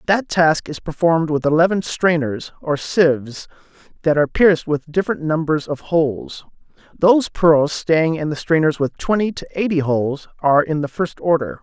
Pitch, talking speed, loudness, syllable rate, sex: 160 Hz, 170 wpm, -18 LUFS, 5.1 syllables/s, male